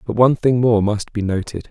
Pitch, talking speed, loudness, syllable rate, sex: 115 Hz, 245 wpm, -17 LUFS, 5.7 syllables/s, male